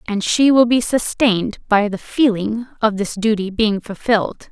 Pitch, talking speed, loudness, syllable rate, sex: 220 Hz, 175 wpm, -17 LUFS, 4.6 syllables/s, female